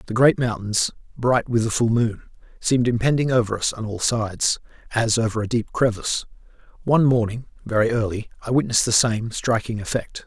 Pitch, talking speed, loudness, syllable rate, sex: 115 Hz, 175 wpm, -21 LUFS, 5.7 syllables/s, male